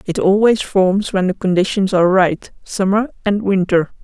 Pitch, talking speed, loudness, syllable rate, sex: 190 Hz, 165 wpm, -16 LUFS, 4.8 syllables/s, female